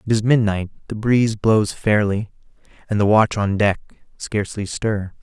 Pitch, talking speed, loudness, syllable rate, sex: 105 Hz, 160 wpm, -19 LUFS, 4.5 syllables/s, male